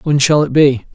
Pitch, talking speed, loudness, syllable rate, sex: 140 Hz, 255 wpm, -12 LUFS, 5.1 syllables/s, male